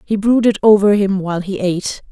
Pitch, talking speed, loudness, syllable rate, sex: 200 Hz, 200 wpm, -15 LUFS, 5.8 syllables/s, female